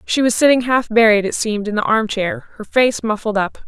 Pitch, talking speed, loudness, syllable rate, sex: 225 Hz, 245 wpm, -16 LUFS, 5.3 syllables/s, female